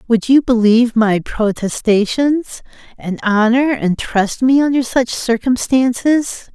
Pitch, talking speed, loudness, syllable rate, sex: 240 Hz, 120 wpm, -15 LUFS, 3.9 syllables/s, female